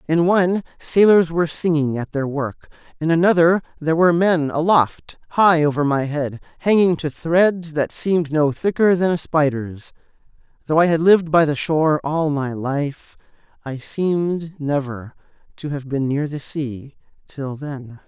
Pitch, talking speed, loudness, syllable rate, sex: 155 Hz, 165 wpm, -19 LUFS, 4.5 syllables/s, male